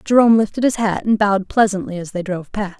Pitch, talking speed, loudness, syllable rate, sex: 205 Hz, 235 wpm, -17 LUFS, 6.7 syllables/s, female